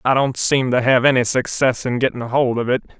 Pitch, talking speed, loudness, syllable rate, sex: 125 Hz, 240 wpm, -17 LUFS, 5.5 syllables/s, male